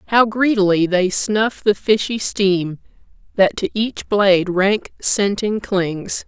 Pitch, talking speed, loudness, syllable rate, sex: 200 Hz, 135 wpm, -17 LUFS, 3.6 syllables/s, female